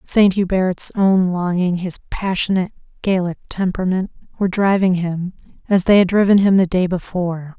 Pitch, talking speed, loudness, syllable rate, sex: 185 Hz, 150 wpm, -17 LUFS, 5.1 syllables/s, female